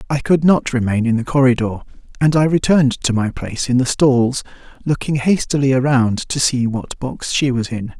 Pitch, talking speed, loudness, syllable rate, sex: 130 Hz, 195 wpm, -17 LUFS, 5.2 syllables/s, male